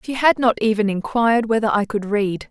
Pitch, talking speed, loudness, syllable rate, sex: 220 Hz, 215 wpm, -19 LUFS, 5.5 syllables/s, female